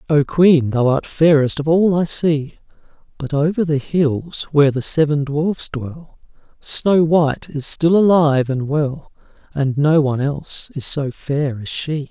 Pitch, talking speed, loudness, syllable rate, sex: 150 Hz, 170 wpm, -17 LUFS, 4.2 syllables/s, male